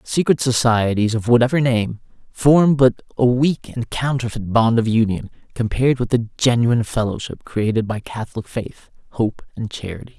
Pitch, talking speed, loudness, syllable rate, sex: 120 Hz, 155 wpm, -19 LUFS, 5.0 syllables/s, male